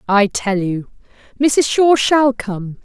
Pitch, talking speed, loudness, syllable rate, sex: 230 Hz, 150 wpm, -16 LUFS, 3.2 syllables/s, female